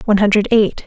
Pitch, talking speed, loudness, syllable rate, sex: 210 Hz, 210 wpm, -14 LUFS, 7.1 syllables/s, female